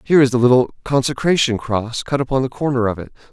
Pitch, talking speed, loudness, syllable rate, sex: 125 Hz, 215 wpm, -17 LUFS, 6.6 syllables/s, male